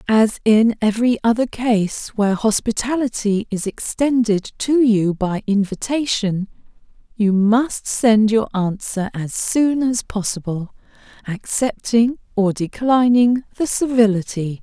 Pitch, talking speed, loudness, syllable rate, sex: 220 Hz, 110 wpm, -18 LUFS, 4.0 syllables/s, female